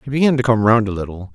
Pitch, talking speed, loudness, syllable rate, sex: 115 Hz, 310 wpm, -16 LUFS, 7.2 syllables/s, male